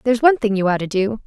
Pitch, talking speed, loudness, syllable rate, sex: 220 Hz, 330 wpm, -18 LUFS, 8.0 syllables/s, female